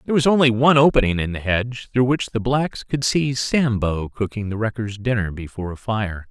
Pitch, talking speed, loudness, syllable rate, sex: 115 Hz, 210 wpm, -20 LUFS, 5.6 syllables/s, male